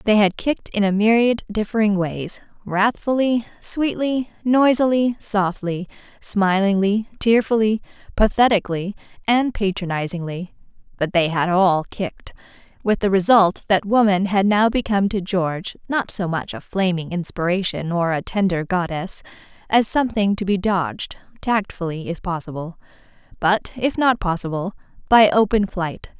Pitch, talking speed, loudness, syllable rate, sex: 200 Hz, 125 wpm, -20 LUFS, 4.7 syllables/s, female